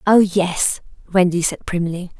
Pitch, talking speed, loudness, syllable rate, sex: 180 Hz, 135 wpm, -18 LUFS, 4.1 syllables/s, female